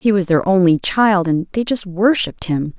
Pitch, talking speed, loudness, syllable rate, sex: 190 Hz, 215 wpm, -16 LUFS, 4.9 syllables/s, female